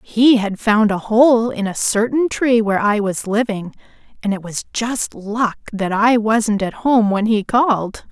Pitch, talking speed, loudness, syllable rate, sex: 220 Hz, 190 wpm, -17 LUFS, 4.1 syllables/s, female